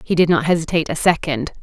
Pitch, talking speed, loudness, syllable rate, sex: 160 Hz, 220 wpm, -18 LUFS, 6.9 syllables/s, female